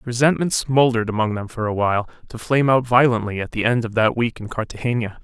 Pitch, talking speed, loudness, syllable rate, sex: 115 Hz, 220 wpm, -20 LUFS, 6.3 syllables/s, male